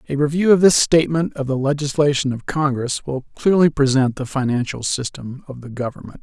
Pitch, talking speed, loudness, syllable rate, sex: 140 Hz, 185 wpm, -18 LUFS, 5.6 syllables/s, male